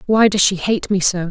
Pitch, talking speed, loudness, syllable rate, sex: 195 Hz, 275 wpm, -16 LUFS, 5.1 syllables/s, female